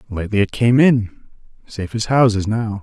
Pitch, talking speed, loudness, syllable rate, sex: 110 Hz, 150 wpm, -17 LUFS, 5.4 syllables/s, male